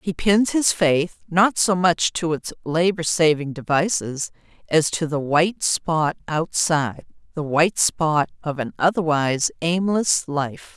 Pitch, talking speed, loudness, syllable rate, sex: 165 Hz, 145 wpm, -21 LUFS, 4.0 syllables/s, female